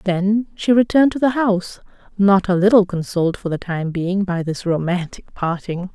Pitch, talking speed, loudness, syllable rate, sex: 190 Hz, 180 wpm, -18 LUFS, 5.0 syllables/s, female